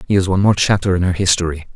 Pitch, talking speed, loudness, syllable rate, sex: 90 Hz, 275 wpm, -16 LUFS, 7.7 syllables/s, male